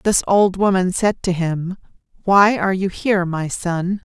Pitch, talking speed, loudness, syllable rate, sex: 185 Hz, 175 wpm, -18 LUFS, 4.4 syllables/s, female